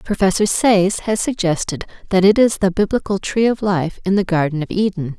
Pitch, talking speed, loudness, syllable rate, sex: 190 Hz, 195 wpm, -17 LUFS, 5.4 syllables/s, female